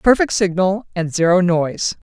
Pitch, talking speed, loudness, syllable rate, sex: 190 Hz, 140 wpm, -17 LUFS, 4.8 syllables/s, female